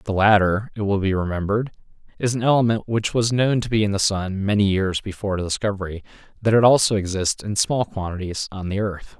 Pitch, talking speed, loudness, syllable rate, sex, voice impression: 100 Hz, 210 wpm, -21 LUFS, 5.8 syllables/s, male, masculine, adult-like, slightly thick, slightly refreshing, sincere